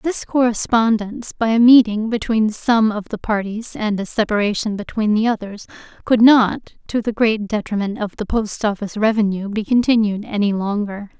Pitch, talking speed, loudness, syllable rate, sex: 215 Hz, 165 wpm, -18 LUFS, 5.1 syllables/s, female